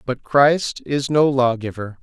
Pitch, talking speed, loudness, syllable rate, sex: 130 Hz, 180 wpm, -18 LUFS, 3.8 syllables/s, male